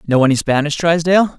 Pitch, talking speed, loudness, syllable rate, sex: 155 Hz, 175 wpm, -15 LUFS, 6.4 syllables/s, male